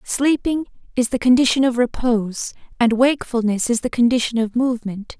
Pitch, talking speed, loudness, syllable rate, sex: 240 Hz, 150 wpm, -19 LUFS, 5.5 syllables/s, female